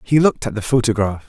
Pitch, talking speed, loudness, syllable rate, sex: 115 Hz, 235 wpm, -18 LUFS, 6.8 syllables/s, male